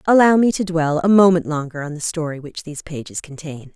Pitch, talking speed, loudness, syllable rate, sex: 160 Hz, 225 wpm, -17 LUFS, 5.8 syllables/s, female